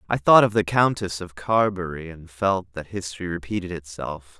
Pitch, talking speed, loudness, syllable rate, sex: 95 Hz, 175 wpm, -23 LUFS, 5.1 syllables/s, male